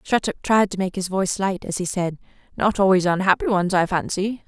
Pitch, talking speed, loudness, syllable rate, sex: 190 Hz, 215 wpm, -21 LUFS, 5.5 syllables/s, female